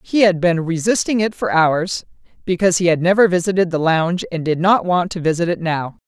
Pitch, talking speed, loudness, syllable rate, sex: 175 Hz, 215 wpm, -17 LUFS, 5.6 syllables/s, female